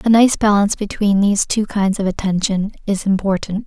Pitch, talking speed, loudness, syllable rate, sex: 200 Hz, 180 wpm, -17 LUFS, 5.5 syllables/s, female